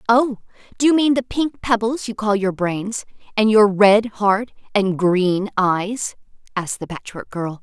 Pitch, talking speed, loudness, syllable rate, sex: 210 Hz, 175 wpm, -19 LUFS, 4.1 syllables/s, female